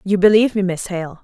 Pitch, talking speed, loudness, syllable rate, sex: 190 Hz, 245 wpm, -16 LUFS, 6.2 syllables/s, female